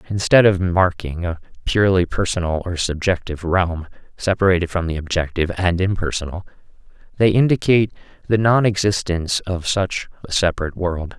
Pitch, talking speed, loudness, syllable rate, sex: 90 Hz, 135 wpm, -19 LUFS, 5.7 syllables/s, male